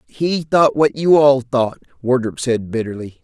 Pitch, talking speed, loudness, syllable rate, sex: 130 Hz, 165 wpm, -17 LUFS, 4.3 syllables/s, male